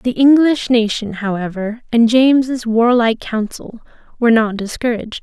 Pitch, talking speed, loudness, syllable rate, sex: 230 Hz, 125 wpm, -15 LUFS, 4.8 syllables/s, female